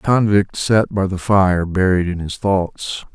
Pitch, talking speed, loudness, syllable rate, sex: 95 Hz, 190 wpm, -17 LUFS, 4.0 syllables/s, male